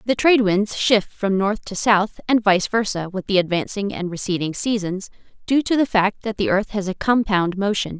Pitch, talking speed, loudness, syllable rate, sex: 200 Hz, 210 wpm, -20 LUFS, 5.0 syllables/s, female